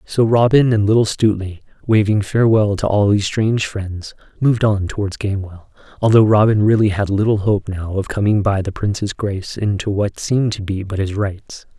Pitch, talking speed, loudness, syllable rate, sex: 105 Hz, 190 wpm, -17 LUFS, 5.5 syllables/s, male